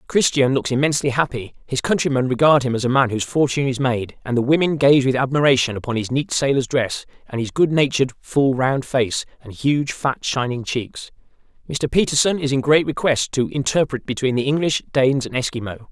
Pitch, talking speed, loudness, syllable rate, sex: 135 Hz, 190 wpm, -19 LUFS, 5.7 syllables/s, male